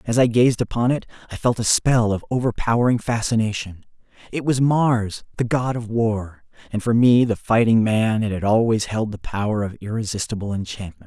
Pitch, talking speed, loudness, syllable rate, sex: 110 Hz, 180 wpm, -20 LUFS, 5.2 syllables/s, male